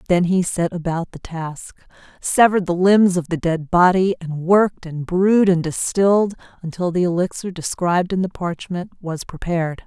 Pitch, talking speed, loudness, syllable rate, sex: 180 Hz, 170 wpm, -19 LUFS, 5.0 syllables/s, female